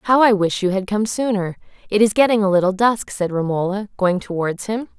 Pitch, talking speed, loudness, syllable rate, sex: 200 Hz, 215 wpm, -19 LUFS, 5.5 syllables/s, female